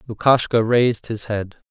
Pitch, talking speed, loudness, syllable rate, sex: 115 Hz, 140 wpm, -19 LUFS, 4.8 syllables/s, male